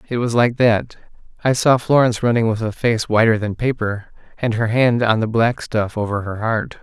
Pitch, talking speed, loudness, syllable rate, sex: 115 Hz, 200 wpm, -18 LUFS, 5.0 syllables/s, male